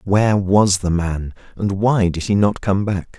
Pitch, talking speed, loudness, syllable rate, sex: 100 Hz, 205 wpm, -18 LUFS, 4.2 syllables/s, male